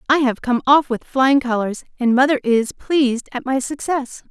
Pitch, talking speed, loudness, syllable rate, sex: 260 Hz, 195 wpm, -18 LUFS, 4.7 syllables/s, female